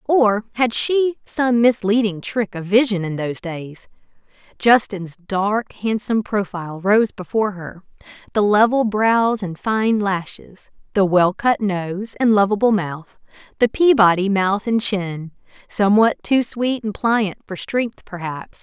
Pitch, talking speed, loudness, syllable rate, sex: 205 Hz, 140 wpm, -19 LUFS, 4.0 syllables/s, female